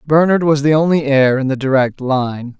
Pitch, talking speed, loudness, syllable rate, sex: 140 Hz, 210 wpm, -14 LUFS, 4.9 syllables/s, male